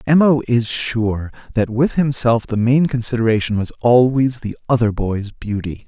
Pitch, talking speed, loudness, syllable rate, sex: 120 Hz, 165 wpm, -17 LUFS, 4.7 syllables/s, male